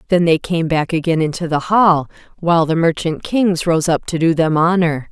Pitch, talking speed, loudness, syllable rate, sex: 165 Hz, 210 wpm, -16 LUFS, 5.0 syllables/s, female